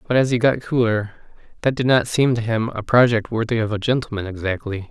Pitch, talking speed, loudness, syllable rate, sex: 115 Hz, 220 wpm, -20 LUFS, 5.9 syllables/s, male